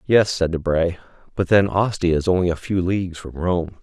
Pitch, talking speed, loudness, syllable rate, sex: 90 Hz, 205 wpm, -20 LUFS, 5.1 syllables/s, male